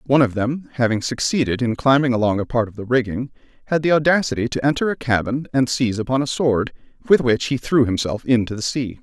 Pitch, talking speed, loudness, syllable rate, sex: 125 Hz, 220 wpm, -20 LUFS, 6.1 syllables/s, male